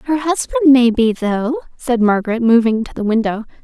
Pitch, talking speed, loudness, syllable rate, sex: 245 Hz, 180 wpm, -15 LUFS, 5.1 syllables/s, female